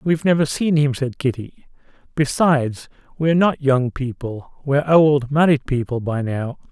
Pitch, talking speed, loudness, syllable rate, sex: 140 Hz, 145 wpm, -19 LUFS, 4.8 syllables/s, male